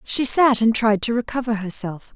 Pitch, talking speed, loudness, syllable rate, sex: 225 Hz, 195 wpm, -19 LUFS, 4.9 syllables/s, female